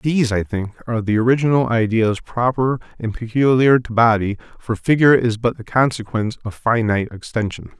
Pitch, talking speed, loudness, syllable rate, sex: 115 Hz, 160 wpm, -18 LUFS, 5.6 syllables/s, male